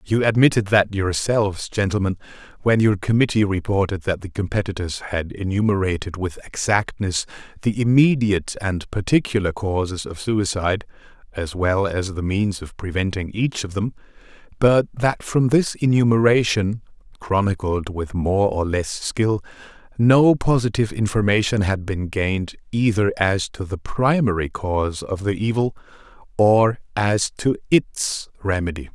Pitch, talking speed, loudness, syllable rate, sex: 100 Hz, 135 wpm, -21 LUFS, 4.6 syllables/s, male